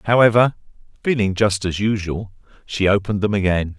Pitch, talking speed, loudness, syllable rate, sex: 100 Hz, 145 wpm, -19 LUFS, 5.4 syllables/s, male